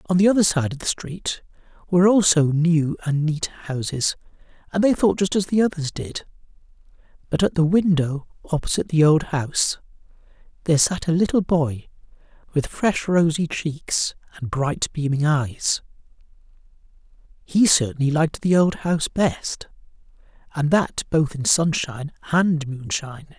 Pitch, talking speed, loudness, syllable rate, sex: 160 Hz, 145 wpm, -21 LUFS, 4.7 syllables/s, male